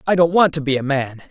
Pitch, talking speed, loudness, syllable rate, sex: 150 Hz, 320 wpm, -17 LUFS, 6.3 syllables/s, male